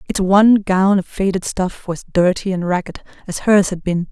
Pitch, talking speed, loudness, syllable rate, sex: 190 Hz, 205 wpm, -16 LUFS, 4.9 syllables/s, female